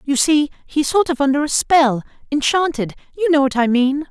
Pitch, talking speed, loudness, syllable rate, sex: 285 Hz, 205 wpm, -17 LUFS, 5.1 syllables/s, female